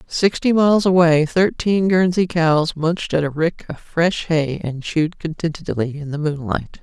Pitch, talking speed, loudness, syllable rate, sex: 165 Hz, 165 wpm, -18 LUFS, 4.6 syllables/s, female